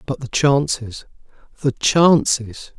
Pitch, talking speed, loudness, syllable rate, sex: 135 Hz, 85 wpm, -18 LUFS, 3.4 syllables/s, male